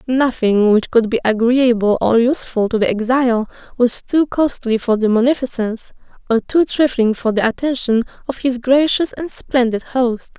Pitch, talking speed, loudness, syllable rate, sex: 240 Hz, 160 wpm, -16 LUFS, 4.9 syllables/s, female